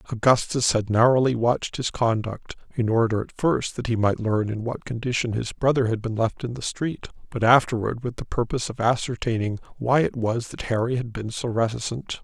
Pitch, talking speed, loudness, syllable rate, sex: 120 Hz, 200 wpm, -24 LUFS, 5.5 syllables/s, male